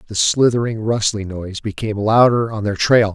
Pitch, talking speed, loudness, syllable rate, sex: 105 Hz, 170 wpm, -17 LUFS, 5.4 syllables/s, male